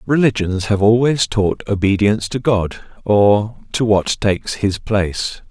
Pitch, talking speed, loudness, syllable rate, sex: 105 Hz, 140 wpm, -17 LUFS, 4.3 syllables/s, male